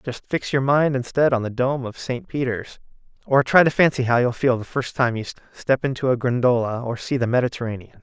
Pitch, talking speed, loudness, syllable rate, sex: 125 Hz, 225 wpm, -21 LUFS, 5.7 syllables/s, male